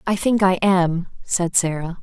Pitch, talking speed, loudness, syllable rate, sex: 180 Hz, 180 wpm, -19 LUFS, 4.0 syllables/s, female